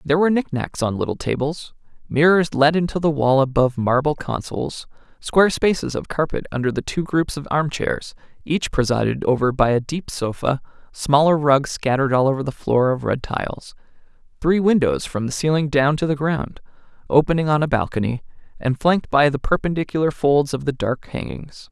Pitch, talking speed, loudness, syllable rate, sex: 145 Hz, 180 wpm, -20 LUFS, 5.4 syllables/s, male